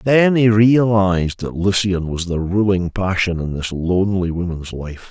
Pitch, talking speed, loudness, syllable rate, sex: 95 Hz, 165 wpm, -17 LUFS, 4.4 syllables/s, male